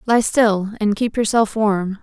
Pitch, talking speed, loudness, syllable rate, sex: 215 Hz, 180 wpm, -18 LUFS, 3.8 syllables/s, female